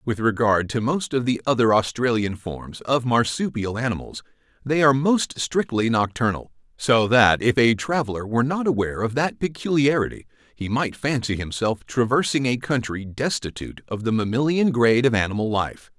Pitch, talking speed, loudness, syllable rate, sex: 120 Hz, 160 wpm, -22 LUFS, 5.2 syllables/s, male